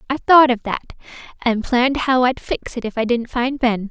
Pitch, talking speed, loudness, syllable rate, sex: 245 Hz, 230 wpm, -18 LUFS, 5.0 syllables/s, female